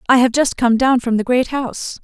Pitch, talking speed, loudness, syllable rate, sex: 250 Hz, 265 wpm, -16 LUFS, 5.5 syllables/s, female